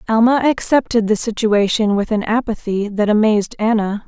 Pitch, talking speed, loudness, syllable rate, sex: 220 Hz, 145 wpm, -16 LUFS, 5.2 syllables/s, female